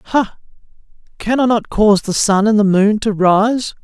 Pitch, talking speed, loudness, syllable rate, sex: 215 Hz, 190 wpm, -14 LUFS, 4.8 syllables/s, male